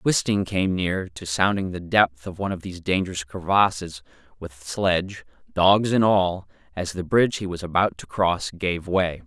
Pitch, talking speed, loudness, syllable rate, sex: 90 Hz, 180 wpm, -23 LUFS, 4.7 syllables/s, male